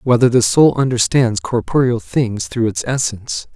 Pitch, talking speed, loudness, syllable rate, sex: 125 Hz, 150 wpm, -16 LUFS, 4.6 syllables/s, male